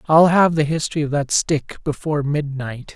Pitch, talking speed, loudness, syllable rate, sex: 150 Hz, 185 wpm, -19 LUFS, 5.1 syllables/s, male